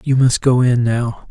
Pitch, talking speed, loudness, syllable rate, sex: 125 Hz, 230 wpm, -15 LUFS, 4.2 syllables/s, male